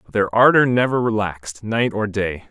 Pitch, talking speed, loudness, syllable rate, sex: 105 Hz, 190 wpm, -18 LUFS, 5.0 syllables/s, male